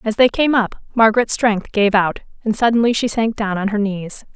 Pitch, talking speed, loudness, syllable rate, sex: 215 Hz, 220 wpm, -17 LUFS, 5.2 syllables/s, female